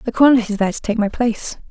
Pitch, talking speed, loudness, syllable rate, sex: 225 Hz, 280 wpm, -17 LUFS, 7.4 syllables/s, female